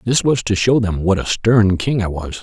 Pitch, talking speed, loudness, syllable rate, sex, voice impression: 105 Hz, 270 wpm, -16 LUFS, 4.8 syllables/s, male, masculine, middle-aged, tensed, powerful, slightly hard, clear, fluent, intellectual, sincere, mature, reassuring, wild, strict